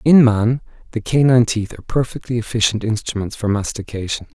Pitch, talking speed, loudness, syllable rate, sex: 115 Hz, 150 wpm, -18 LUFS, 5.9 syllables/s, male